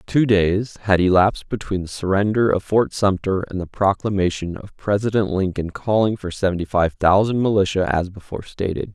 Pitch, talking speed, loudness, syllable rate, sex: 100 Hz, 170 wpm, -20 LUFS, 5.3 syllables/s, male